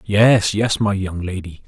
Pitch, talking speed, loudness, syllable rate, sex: 100 Hz, 145 wpm, -18 LUFS, 3.9 syllables/s, male